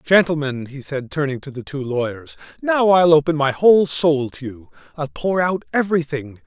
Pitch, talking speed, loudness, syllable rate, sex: 150 Hz, 185 wpm, -19 LUFS, 5.1 syllables/s, male